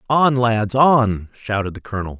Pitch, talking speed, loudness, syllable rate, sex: 115 Hz, 165 wpm, -18 LUFS, 4.8 syllables/s, male